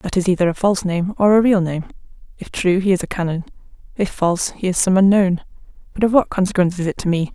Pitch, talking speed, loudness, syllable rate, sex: 185 Hz, 245 wpm, -18 LUFS, 6.6 syllables/s, female